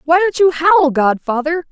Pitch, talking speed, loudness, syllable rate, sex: 320 Hz, 175 wpm, -14 LUFS, 4.4 syllables/s, female